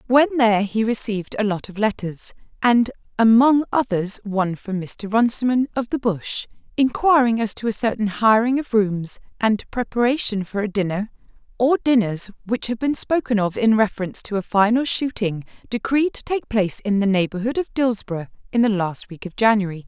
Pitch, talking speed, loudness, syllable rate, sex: 220 Hz, 180 wpm, -20 LUFS, 5.3 syllables/s, female